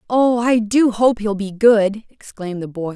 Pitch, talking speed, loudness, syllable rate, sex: 215 Hz, 205 wpm, -17 LUFS, 4.5 syllables/s, female